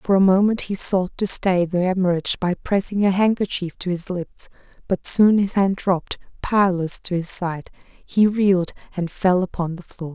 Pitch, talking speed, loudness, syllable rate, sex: 185 Hz, 190 wpm, -20 LUFS, 4.8 syllables/s, female